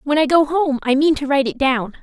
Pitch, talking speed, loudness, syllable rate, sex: 285 Hz, 295 wpm, -17 LUFS, 5.9 syllables/s, female